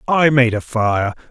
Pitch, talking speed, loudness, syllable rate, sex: 125 Hz, 185 wpm, -16 LUFS, 4.0 syllables/s, male